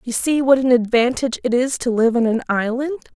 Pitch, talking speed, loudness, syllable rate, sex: 250 Hz, 225 wpm, -18 LUFS, 5.5 syllables/s, female